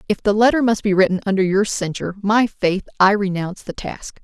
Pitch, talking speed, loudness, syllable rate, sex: 200 Hz, 215 wpm, -18 LUFS, 5.8 syllables/s, female